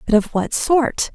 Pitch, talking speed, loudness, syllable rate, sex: 255 Hz, 210 wpm, -18 LUFS, 3.9 syllables/s, female